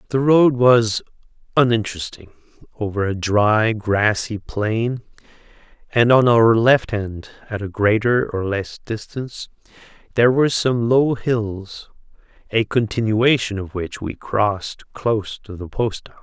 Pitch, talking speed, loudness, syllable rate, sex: 110 Hz, 130 wpm, -19 LUFS, 4.1 syllables/s, male